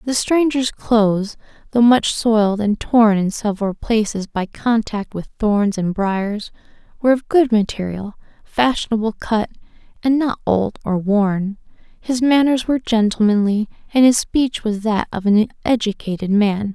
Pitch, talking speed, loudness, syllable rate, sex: 220 Hz, 145 wpm, -18 LUFS, 4.5 syllables/s, female